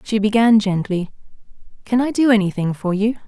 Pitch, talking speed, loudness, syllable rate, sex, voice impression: 210 Hz, 165 wpm, -18 LUFS, 5.5 syllables/s, female, feminine, adult-like, tensed, slightly hard, clear, intellectual, calm, reassuring, elegant, lively, slightly sharp